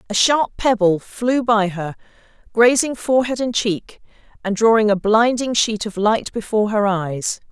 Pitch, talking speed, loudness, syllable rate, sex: 220 Hz, 160 wpm, -18 LUFS, 4.5 syllables/s, female